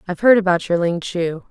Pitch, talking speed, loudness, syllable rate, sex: 180 Hz, 240 wpm, -17 LUFS, 6.0 syllables/s, female